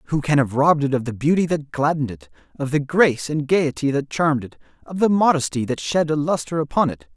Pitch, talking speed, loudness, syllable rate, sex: 145 Hz, 235 wpm, -20 LUFS, 6.1 syllables/s, male